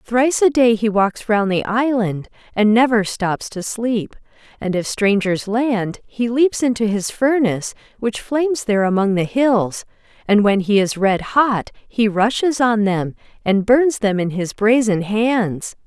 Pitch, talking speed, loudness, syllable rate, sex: 220 Hz, 170 wpm, -18 LUFS, 4.1 syllables/s, female